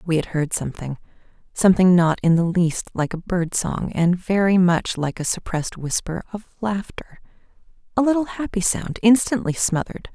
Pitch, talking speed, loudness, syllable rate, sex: 185 Hz, 155 wpm, -21 LUFS, 5.1 syllables/s, female